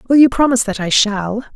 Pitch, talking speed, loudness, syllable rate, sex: 230 Hz, 230 wpm, -14 LUFS, 6.3 syllables/s, female